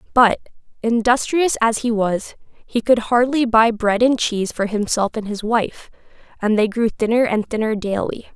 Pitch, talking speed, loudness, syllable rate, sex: 225 Hz, 170 wpm, -19 LUFS, 4.7 syllables/s, female